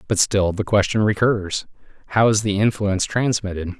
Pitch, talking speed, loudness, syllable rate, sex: 105 Hz, 160 wpm, -20 LUFS, 5.2 syllables/s, male